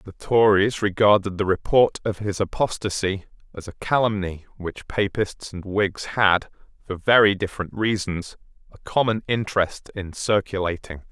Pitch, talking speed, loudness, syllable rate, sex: 100 Hz, 135 wpm, -22 LUFS, 4.6 syllables/s, male